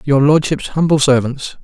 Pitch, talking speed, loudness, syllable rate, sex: 140 Hz, 145 wpm, -14 LUFS, 4.7 syllables/s, male